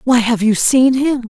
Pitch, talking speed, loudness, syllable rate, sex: 240 Hz, 230 wpm, -13 LUFS, 4.4 syllables/s, female